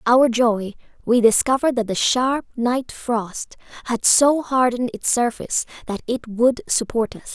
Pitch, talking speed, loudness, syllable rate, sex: 245 Hz, 165 wpm, -20 LUFS, 4.6 syllables/s, female